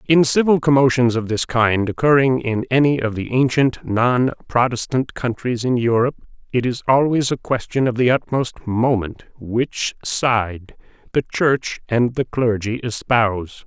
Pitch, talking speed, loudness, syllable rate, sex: 125 Hz, 150 wpm, -19 LUFS, 4.3 syllables/s, male